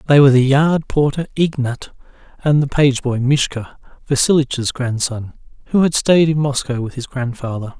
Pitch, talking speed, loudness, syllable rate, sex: 135 Hz, 160 wpm, -17 LUFS, 4.9 syllables/s, male